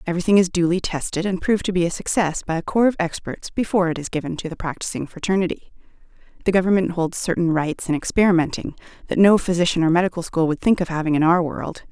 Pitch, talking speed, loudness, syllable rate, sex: 175 Hz, 215 wpm, -20 LUFS, 6.7 syllables/s, female